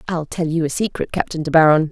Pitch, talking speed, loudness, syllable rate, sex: 160 Hz, 250 wpm, -18 LUFS, 6.3 syllables/s, female